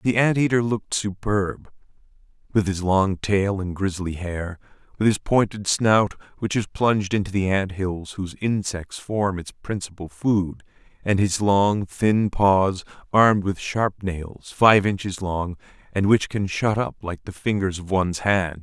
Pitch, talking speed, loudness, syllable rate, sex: 100 Hz, 170 wpm, -22 LUFS, 4.2 syllables/s, male